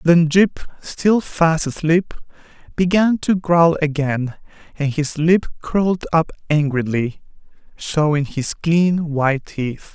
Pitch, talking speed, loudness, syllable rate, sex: 160 Hz, 120 wpm, -18 LUFS, 3.6 syllables/s, male